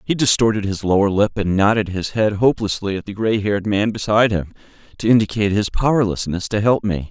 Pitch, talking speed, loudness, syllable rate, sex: 105 Hz, 205 wpm, -18 LUFS, 6.1 syllables/s, male